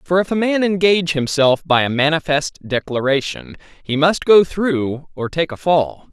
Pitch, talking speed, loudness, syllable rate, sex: 155 Hz, 175 wpm, -17 LUFS, 4.6 syllables/s, male